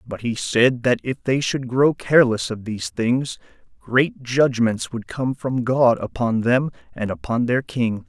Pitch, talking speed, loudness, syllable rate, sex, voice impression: 120 Hz, 180 wpm, -21 LUFS, 4.2 syllables/s, male, very masculine, middle-aged, very thick, tensed, slightly powerful, slightly bright, slightly soft, slightly muffled, fluent, slightly raspy, cool, very intellectual, refreshing, sincere, very calm, very mature, friendly, reassuring, unique, elegant, wild, slightly sweet, lively, kind, slightly modest